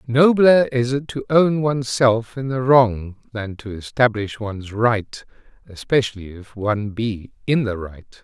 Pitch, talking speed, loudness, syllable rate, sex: 115 Hz, 155 wpm, -19 LUFS, 4.2 syllables/s, male